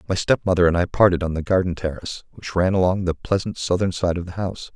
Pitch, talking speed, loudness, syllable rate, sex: 90 Hz, 240 wpm, -21 LUFS, 6.5 syllables/s, male